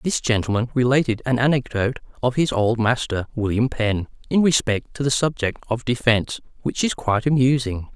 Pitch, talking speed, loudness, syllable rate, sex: 120 Hz, 165 wpm, -21 LUFS, 5.5 syllables/s, male